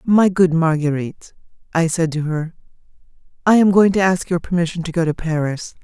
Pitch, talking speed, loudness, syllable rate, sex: 170 Hz, 185 wpm, -18 LUFS, 5.5 syllables/s, female